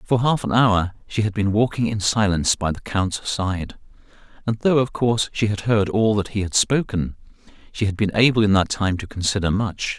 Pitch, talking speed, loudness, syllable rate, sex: 105 Hz, 215 wpm, -21 LUFS, 5.2 syllables/s, male